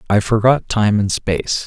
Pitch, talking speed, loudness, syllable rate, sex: 110 Hz, 180 wpm, -16 LUFS, 4.7 syllables/s, male